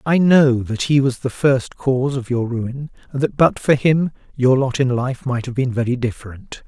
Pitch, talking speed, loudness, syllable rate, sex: 130 Hz, 225 wpm, -18 LUFS, 4.7 syllables/s, male